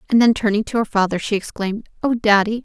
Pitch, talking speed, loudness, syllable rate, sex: 215 Hz, 225 wpm, -19 LUFS, 6.6 syllables/s, female